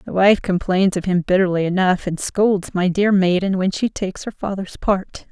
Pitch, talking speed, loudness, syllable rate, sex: 190 Hz, 205 wpm, -19 LUFS, 4.9 syllables/s, female